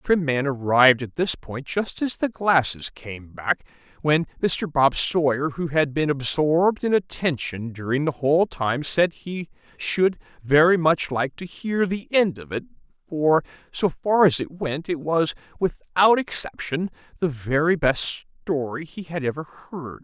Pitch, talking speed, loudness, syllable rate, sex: 155 Hz, 170 wpm, -23 LUFS, 4.2 syllables/s, male